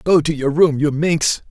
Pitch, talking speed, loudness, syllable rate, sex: 155 Hz, 240 wpm, -16 LUFS, 4.4 syllables/s, male